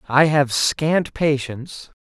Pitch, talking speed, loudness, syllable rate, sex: 145 Hz, 120 wpm, -19 LUFS, 3.4 syllables/s, male